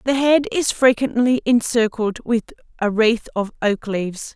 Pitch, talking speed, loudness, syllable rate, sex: 230 Hz, 150 wpm, -19 LUFS, 4.4 syllables/s, female